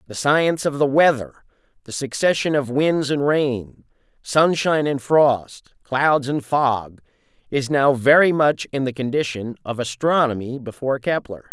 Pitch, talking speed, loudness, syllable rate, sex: 135 Hz, 145 wpm, -20 LUFS, 4.4 syllables/s, male